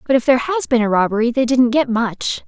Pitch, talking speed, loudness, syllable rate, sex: 245 Hz, 265 wpm, -16 LUFS, 6.1 syllables/s, female